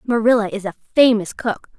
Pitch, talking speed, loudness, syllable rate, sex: 220 Hz, 170 wpm, -18 LUFS, 5.7 syllables/s, female